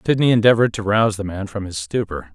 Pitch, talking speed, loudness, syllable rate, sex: 105 Hz, 230 wpm, -19 LUFS, 6.8 syllables/s, male